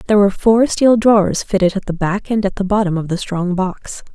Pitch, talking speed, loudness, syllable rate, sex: 200 Hz, 245 wpm, -16 LUFS, 5.7 syllables/s, female